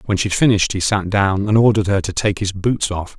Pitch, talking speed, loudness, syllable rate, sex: 100 Hz, 285 wpm, -17 LUFS, 6.2 syllables/s, male